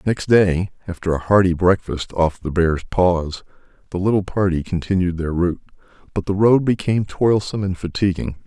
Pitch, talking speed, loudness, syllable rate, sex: 90 Hz, 165 wpm, -19 LUFS, 5.3 syllables/s, male